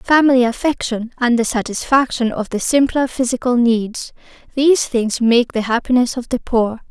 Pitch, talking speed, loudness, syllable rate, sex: 245 Hz, 140 wpm, -16 LUFS, 4.9 syllables/s, female